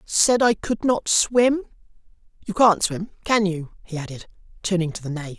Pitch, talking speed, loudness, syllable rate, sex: 195 Hz, 180 wpm, -21 LUFS, 4.9 syllables/s, male